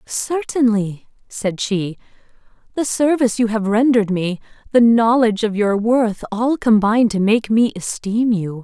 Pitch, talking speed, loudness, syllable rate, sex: 220 Hz, 145 wpm, -17 LUFS, 4.5 syllables/s, female